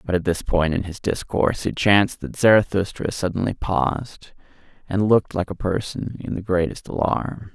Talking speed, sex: 175 wpm, male